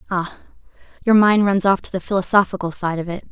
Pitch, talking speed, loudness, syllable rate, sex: 190 Hz, 180 wpm, -18 LUFS, 6.3 syllables/s, female